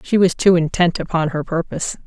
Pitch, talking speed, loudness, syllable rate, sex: 170 Hz, 205 wpm, -18 LUFS, 5.8 syllables/s, female